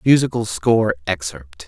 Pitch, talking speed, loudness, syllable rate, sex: 95 Hz, 105 wpm, -19 LUFS, 2.1 syllables/s, male